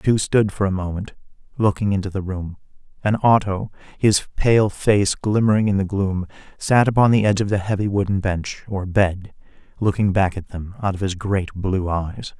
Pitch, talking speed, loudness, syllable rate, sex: 100 Hz, 195 wpm, -20 LUFS, 5.0 syllables/s, male